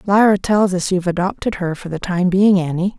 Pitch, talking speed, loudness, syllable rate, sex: 185 Hz, 220 wpm, -17 LUFS, 5.6 syllables/s, female